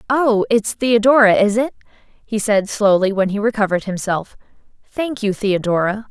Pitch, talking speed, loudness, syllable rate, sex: 210 Hz, 145 wpm, -17 LUFS, 4.7 syllables/s, female